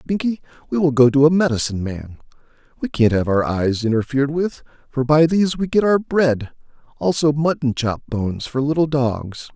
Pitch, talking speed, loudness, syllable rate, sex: 140 Hz, 180 wpm, -19 LUFS, 5.4 syllables/s, male